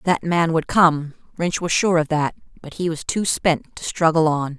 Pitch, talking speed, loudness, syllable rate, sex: 160 Hz, 220 wpm, -20 LUFS, 4.5 syllables/s, female